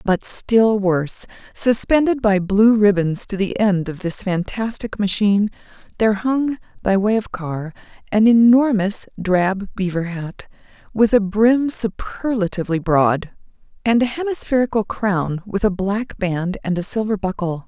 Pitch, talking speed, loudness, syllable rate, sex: 205 Hz, 145 wpm, -19 LUFS, 4.3 syllables/s, female